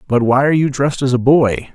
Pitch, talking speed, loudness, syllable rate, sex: 135 Hz, 275 wpm, -14 LUFS, 6.3 syllables/s, male